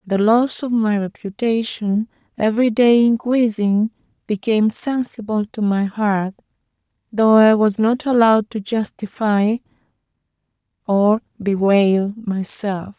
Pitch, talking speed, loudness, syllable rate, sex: 215 Hz, 105 wpm, -18 LUFS, 4.0 syllables/s, female